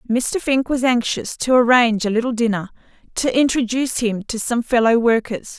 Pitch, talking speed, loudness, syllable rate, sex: 240 Hz, 170 wpm, -18 LUFS, 5.2 syllables/s, female